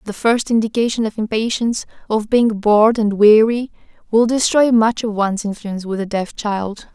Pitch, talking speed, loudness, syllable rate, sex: 220 Hz, 175 wpm, -17 LUFS, 5.2 syllables/s, female